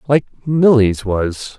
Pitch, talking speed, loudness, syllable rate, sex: 120 Hz, 115 wpm, -15 LUFS, 2.8 syllables/s, male